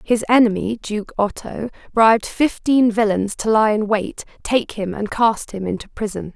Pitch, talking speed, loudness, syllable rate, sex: 215 Hz, 170 wpm, -19 LUFS, 4.6 syllables/s, female